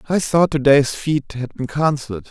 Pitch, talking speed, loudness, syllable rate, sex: 140 Hz, 180 wpm, -18 LUFS, 5.2 syllables/s, male